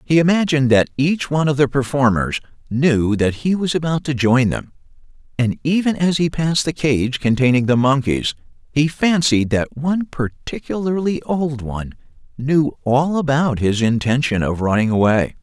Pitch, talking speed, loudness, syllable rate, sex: 135 Hz, 160 wpm, -18 LUFS, 4.8 syllables/s, male